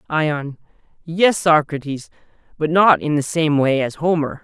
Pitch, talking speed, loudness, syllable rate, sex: 155 Hz, 150 wpm, -18 LUFS, 4.2 syllables/s, male